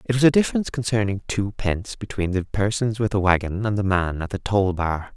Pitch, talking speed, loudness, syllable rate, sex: 100 Hz, 220 wpm, -22 LUFS, 5.8 syllables/s, male